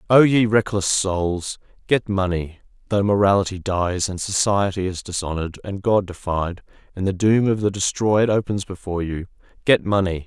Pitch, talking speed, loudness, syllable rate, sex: 95 Hz, 145 wpm, -21 LUFS, 4.9 syllables/s, male